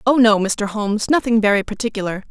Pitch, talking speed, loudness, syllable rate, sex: 215 Hz, 155 wpm, -18 LUFS, 6.1 syllables/s, female